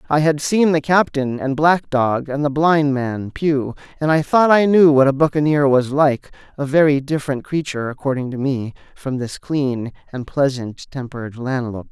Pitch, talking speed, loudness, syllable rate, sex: 140 Hz, 180 wpm, -18 LUFS, 4.7 syllables/s, male